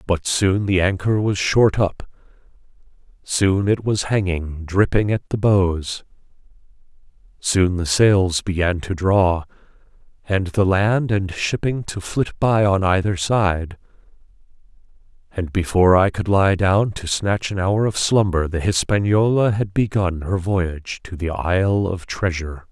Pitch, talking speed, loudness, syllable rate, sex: 95 Hz, 145 wpm, -19 LUFS, 4.1 syllables/s, male